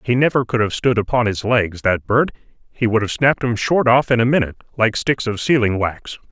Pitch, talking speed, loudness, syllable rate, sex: 115 Hz, 235 wpm, -18 LUFS, 5.7 syllables/s, male